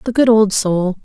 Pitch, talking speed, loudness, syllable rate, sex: 210 Hz, 230 wpm, -14 LUFS, 4.5 syllables/s, female